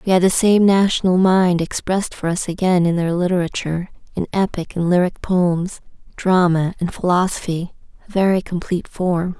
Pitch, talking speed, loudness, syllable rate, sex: 180 Hz, 160 wpm, -18 LUFS, 5.2 syllables/s, female